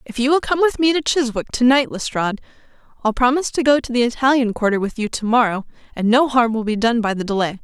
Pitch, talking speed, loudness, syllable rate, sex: 245 Hz, 250 wpm, -18 LUFS, 6.4 syllables/s, female